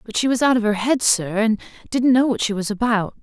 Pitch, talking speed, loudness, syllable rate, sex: 225 Hz, 280 wpm, -19 LUFS, 5.8 syllables/s, female